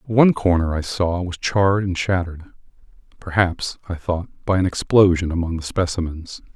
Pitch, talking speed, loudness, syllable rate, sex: 90 Hz, 155 wpm, -20 LUFS, 5.3 syllables/s, male